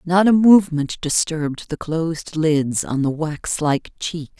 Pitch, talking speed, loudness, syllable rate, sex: 160 Hz, 165 wpm, -19 LUFS, 4.1 syllables/s, female